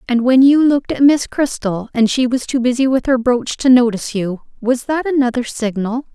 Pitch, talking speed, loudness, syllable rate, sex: 250 Hz, 215 wpm, -15 LUFS, 5.2 syllables/s, female